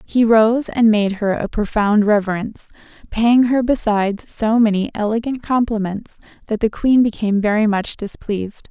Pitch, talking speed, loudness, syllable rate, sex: 220 Hz, 150 wpm, -17 LUFS, 4.9 syllables/s, female